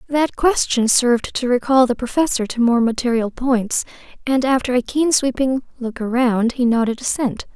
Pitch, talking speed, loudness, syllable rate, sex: 250 Hz, 165 wpm, -18 LUFS, 4.9 syllables/s, female